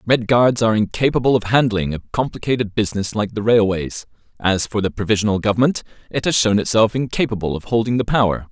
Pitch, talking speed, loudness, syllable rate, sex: 110 Hz, 185 wpm, -18 LUFS, 6.3 syllables/s, male